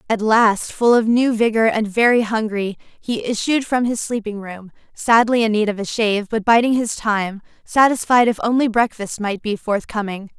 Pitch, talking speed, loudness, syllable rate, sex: 220 Hz, 185 wpm, -18 LUFS, 4.8 syllables/s, female